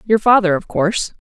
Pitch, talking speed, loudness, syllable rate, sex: 195 Hz, 195 wpm, -15 LUFS, 5.6 syllables/s, female